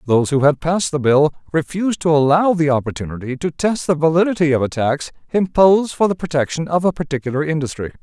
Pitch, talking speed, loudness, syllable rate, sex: 155 Hz, 195 wpm, -17 LUFS, 6.4 syllables/s, male